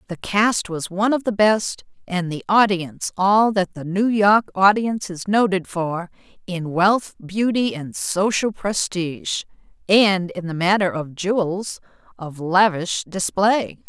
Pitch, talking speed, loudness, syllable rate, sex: 190 Hz, 145 wpm, -20 LUFS, 4.0 syllables/s, female